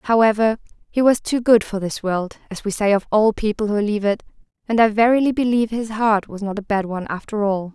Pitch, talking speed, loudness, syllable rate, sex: 215 Hz, 230 wpm, -19 LUFS, 4.7 syllables/s, female